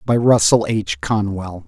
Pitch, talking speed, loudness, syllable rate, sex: 105 Hz, 145 wpm, -17 LUFS, 4.0 syllables/s, male